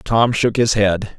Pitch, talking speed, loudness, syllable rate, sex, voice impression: 105 Hz, 200 wpm, -16 LUFS, 3.7 syllables/s, male, masculine, very adult-like, slightly fluent, intellectual, slightly mature, slightly sweet